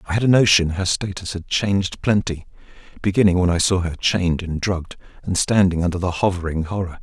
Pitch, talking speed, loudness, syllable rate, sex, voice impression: 90 Hz, 195 wpm, -20 LUFS, 6.0 syllables/s, male, masculine, adult-like, slightly soft, cool, sincere, slightly calm, slightly reassuring, slightly kind